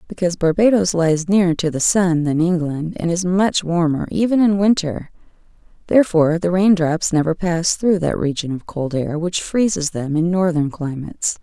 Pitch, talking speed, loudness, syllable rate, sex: 170 Hz, 180 wpm, -18 LUFS, 5.0 syllables/s, female